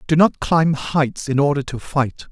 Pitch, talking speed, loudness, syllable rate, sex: 145 Hz, 205 wpm, -19 LUFS, 4.2 syllables/s, male